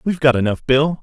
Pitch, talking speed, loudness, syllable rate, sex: 140 Hz, 235 wpm, -17 LUFS, 6.7 syllables/s, male